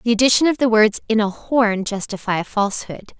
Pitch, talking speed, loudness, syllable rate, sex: 220 Hz, 205 wpm, -18 LUFS, 5.9 syllables/s, female